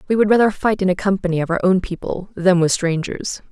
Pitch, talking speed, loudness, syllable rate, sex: 190 Hz, 240 wpm, -18 LUFS, 6.0 syllables/s, female